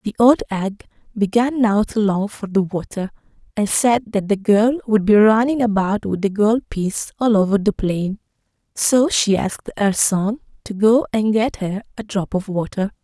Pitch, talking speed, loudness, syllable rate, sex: 210 Hz, 190 wpm, -18 LUFS, 4.6 syllables/s, female